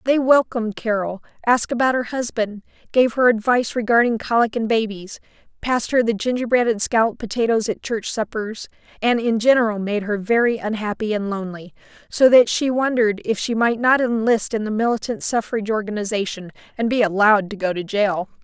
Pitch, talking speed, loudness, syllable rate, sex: 225 Hz, 175 wpm, -20 LUFS, 5.7 syllables/s, female